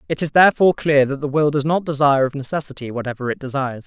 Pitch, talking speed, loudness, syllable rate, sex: 145 Hz, 235 wpm, -18 LUFS, 7.3 syllables/s, male